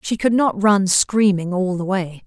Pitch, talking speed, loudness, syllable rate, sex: 195 Hz, 210 wpm, -18 LUFS, 4.2 syllables/s, female